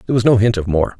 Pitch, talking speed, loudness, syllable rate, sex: 105 Hz, 365 wpm, -15 LUFS, 8.5 syllables/s, male